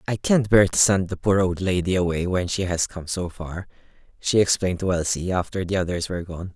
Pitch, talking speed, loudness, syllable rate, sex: 90 Hz, 230 wpm, -22 LUFS, 5.6 syllables/s, male